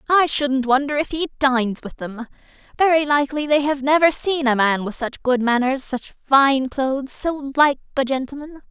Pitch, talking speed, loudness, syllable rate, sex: 275 Hz, 185 wpm, -19 LUFS, 5.0 syllables/s, female